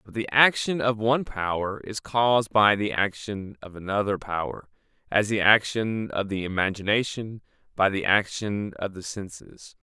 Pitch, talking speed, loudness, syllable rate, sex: 105 Hz, 155 wpm, -24 LUFS, 4.6 syllables/s, male